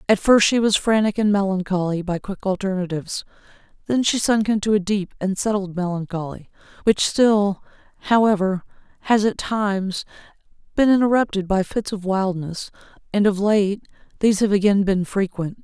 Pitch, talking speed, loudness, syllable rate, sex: 200 Hz, 150 wpm, -20 LUFS, 5.2 syllables/s, female